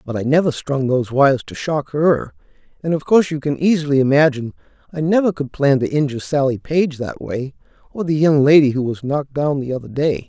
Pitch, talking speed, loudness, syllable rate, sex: 145 Hz, 215 wpm, -18 LUFS, 6.0 syllables/s, male